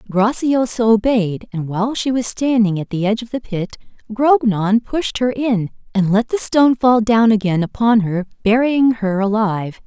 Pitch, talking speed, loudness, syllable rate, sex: 220 Hz, 175 wpm, -17 LUFS, 4.8 syllables/s, female